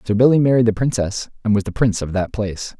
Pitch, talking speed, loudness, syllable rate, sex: 110 Hz, 255 wpm, -18 LUFS, 6.9 syllables/s, male